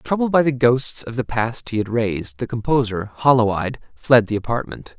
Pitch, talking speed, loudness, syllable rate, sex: 120 Hz, 205 wpm, -20 LUFS, 5.0 syllables/s, male